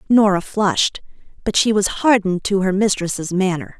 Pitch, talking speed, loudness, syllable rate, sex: 195 Hz, 160 wpm, -18 LUFS, 5.0 syllables/s, female